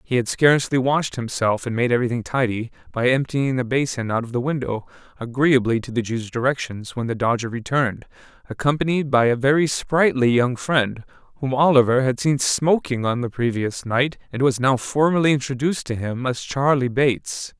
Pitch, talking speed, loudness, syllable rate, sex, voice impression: 130 Hz, 180 wpm, -21 LUFS, 5.4 syllables/s, male, masculine, adult-like, tensed, powerful, bright, halting, slightly raspy, mature, friendly, wild, lively, slightly intense, slightly sharp